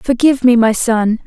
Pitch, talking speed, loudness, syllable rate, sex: 240 Hz, 190 wpm, -12 LUFS, 5.1 syllables/s, female